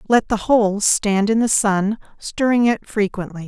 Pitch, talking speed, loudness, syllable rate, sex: 210 Hz, 175 wpm, -18 LUFS, 4.5 syllables/s, female